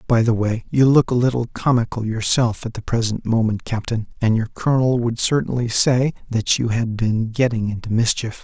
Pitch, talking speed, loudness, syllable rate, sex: 115 Hz, 190 wpm, -19 LUFS, 5.2 syllables/s, male